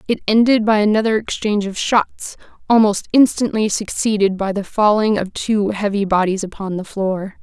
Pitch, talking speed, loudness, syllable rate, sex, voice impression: 205 Hz, 160 wpm, -17 LUFS, 5.0 syllables/s, female, feminine, slightly adult-like, slightly clear, slightly muffled, slightly refreshing, friendly